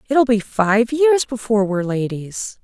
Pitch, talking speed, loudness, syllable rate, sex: 225 Hz, 160 wpm, -18 LUFS, 4.5 syllables/s, female